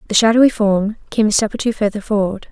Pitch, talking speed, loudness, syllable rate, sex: 210 Hz, 240 wpm, -16 LUFS, 6.4 syllables/s, female